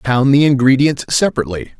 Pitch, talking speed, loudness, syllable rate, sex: 135 Hz, 135 wpm, -14 LUFS, 6.3 syllables/s, male